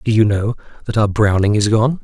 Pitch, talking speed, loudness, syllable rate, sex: 110 Hz, 235 wpm, -16 LUFS, 5.6 syllables/s, male